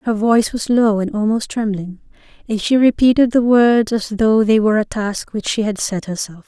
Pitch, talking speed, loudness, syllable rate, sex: 215 Hz, 215 wpm, -16 LUFS, 5.1 syllables/s, female